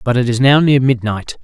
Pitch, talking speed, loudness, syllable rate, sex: 125 Hz, 250 wpm, -13 LUFS, 5.5 syllables/s, male